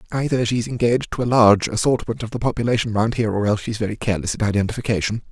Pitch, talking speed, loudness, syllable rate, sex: 110 Hz, 215 wpm, -20 LUFS, 7.6 syllables/s, male